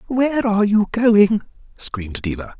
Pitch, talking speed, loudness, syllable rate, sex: 195 Hz, 140 wpm, -18 LUFS, 5.3 syllables/s, male